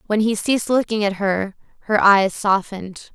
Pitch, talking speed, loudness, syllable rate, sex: 205 Hz, 170 wpm, -18 LUFS, 4.9 syllables/s, female